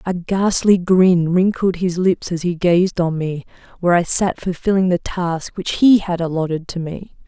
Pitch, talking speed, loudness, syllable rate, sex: 180 Hz, 190 wpm, -17 LUFS, 4.5 syllables/s, female